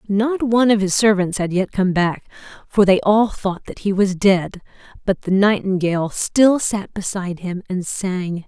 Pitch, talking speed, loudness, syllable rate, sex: 195 Hz, 185 wpm, -18 LUFS, 4.5 syllables/s, female